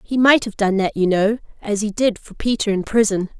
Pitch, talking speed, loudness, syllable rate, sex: 210 Hz, 250 wpm, -19 LUFS, 5.4 syllables/s, female